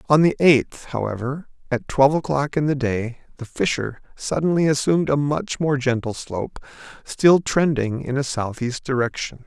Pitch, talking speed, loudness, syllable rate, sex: 135 Hz, 160 wpm, -21 LUFS, 5.0 syllables/s, male